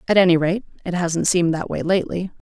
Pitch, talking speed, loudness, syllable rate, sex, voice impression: 175 Hz, 215 wpm, -20 LUFS, 6.6 syllables/s, female, very feminine, very middle-aged, slightly thin, tensed, slightly powerful, slightly bright, slightly soft, clear, very fluent, slightly raspy, cool, very intellectual, refreshing, sincere, calm, very friendly, reassuring, unique, elegant, slightly wild, sweet, lively, strict, slightly intense, slightly sharp, slightly light